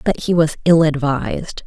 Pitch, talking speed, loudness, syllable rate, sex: 155 Hz, 180 wpm, -17 LUFS, 4.8 syllables/s, female